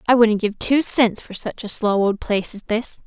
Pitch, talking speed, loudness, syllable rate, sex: 220 Hz, 255 wpm, -20 LUFS, 4.8 syllables/s, female